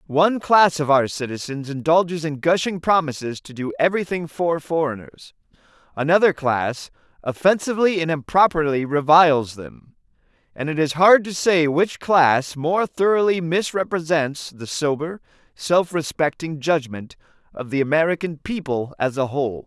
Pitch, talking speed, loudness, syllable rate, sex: 155 Hz, 135 wpm, -20 LUFS, 4.8 syllables/s, male